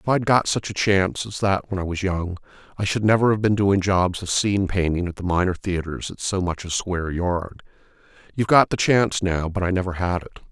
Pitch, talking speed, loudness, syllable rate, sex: 95 Hz, 240 wpm, -22 LUFS, 5.7 syllables/s, male